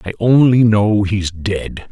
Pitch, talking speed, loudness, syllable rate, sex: 105 Hz, 155 wpm, -14 LUFS, 3.5 syllables/s, male